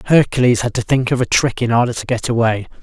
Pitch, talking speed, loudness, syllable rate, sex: 120 Hz, 255 wpm, -16 LUFS, 6.4 syllables/s, male